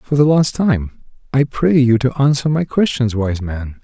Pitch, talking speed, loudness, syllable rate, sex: 130 Hz, 205 wpm, -16 LUFS, 4.6 syllables/s, male